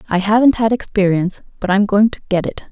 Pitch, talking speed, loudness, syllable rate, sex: 205 Hz, 200 wpm, -16 LUFS, 6.2 syllables/s, female